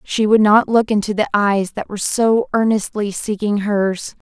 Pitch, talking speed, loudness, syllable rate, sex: 210 Hz, 180 wpm, -17 LUFS, 4.5 syllables/s, female